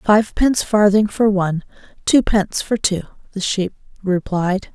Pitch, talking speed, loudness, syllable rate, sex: 200 Hz, 115 wpm, -18 LUFS, 4.8 syllables/s, female